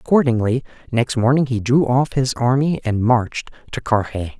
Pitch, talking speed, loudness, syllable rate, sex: 125 Hz, 165 wpm, -18 LUFS, 5.1 syllables/s, male